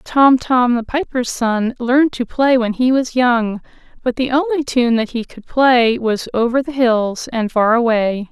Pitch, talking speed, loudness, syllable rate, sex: 245 Hz, 195 wpm, -16 LUFS, 4.2 syllables/s, female